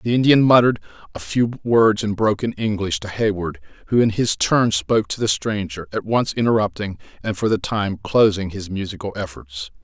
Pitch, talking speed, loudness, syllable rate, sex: 105 Hz, 185 wpm, -20 LUFS, 5.2 syllables/s, male